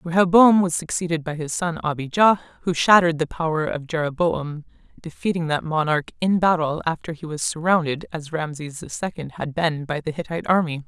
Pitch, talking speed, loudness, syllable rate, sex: 165 Hz, 175 wpm, -21 LUFS, 5.6 syllables/s, female